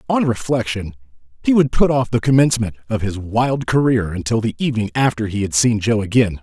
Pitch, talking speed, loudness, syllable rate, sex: 115 Hz, 195 wpm, -18 LUFS, 5.8 syllables/s, male